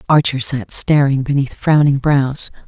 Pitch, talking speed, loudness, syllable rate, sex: 140 Hz, 135 wpm, -15 LUFS, 4.2 syllables/s, female